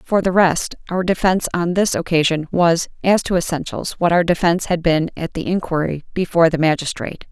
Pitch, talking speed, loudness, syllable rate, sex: 170 Hz, 190 wpm, -18 LUFS, 5.7 syllables/s, female